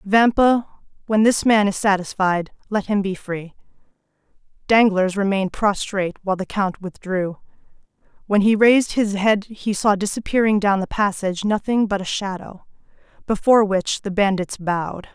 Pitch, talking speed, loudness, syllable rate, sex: 200 Hz, 145 wpm, -20 LUFS, 5.0 syllables/s, female